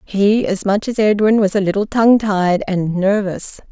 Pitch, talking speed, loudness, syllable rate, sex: 200 Hz, 195 wpm, -16 LUFS, 4.6 syllables/s, female